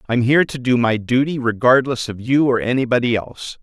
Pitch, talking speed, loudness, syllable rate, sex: 125 Hz, 200 wpm, -17 LUFS, 5.8 syllables/s, male